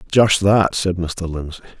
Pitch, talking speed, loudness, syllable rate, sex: 90 Hz, 165 wpm, -17 LUFS, 4.2 syllables/s, male